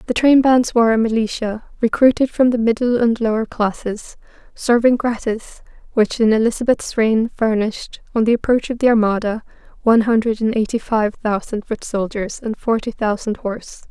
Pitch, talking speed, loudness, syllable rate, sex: 225 Hz, 160 wpm, -18 LUFS, 5.2 syllables/s, female